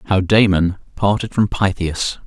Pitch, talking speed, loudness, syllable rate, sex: 95 Hz, 135 wpm, -17 LUFS, 4.4 syllables/s, male